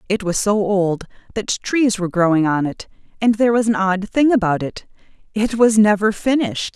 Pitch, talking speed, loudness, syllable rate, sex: 205 Hz, 195 wpm, -18 LUFS, 5.3 syllables/s, female